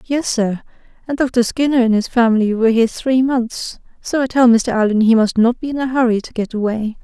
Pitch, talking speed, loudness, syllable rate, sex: 235 Hz, 220 wpm, -16 LUFS, 5.6 syllables/s, female